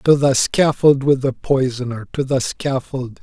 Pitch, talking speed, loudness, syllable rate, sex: 130 Hz, 150 wpm, -18 LUFS, 4.2 syllables/s, male